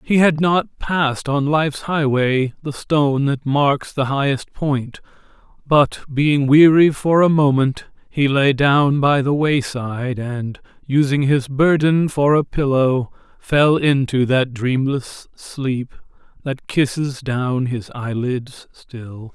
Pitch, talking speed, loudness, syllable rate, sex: 140 Hz, 135 wpm, -18 LUFS, 3.5 syllables/s, male